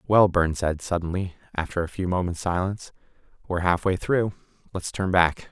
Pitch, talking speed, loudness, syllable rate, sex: 90 Hz, 165 wpm, -25 LUFS, 5.6 syllables/s, male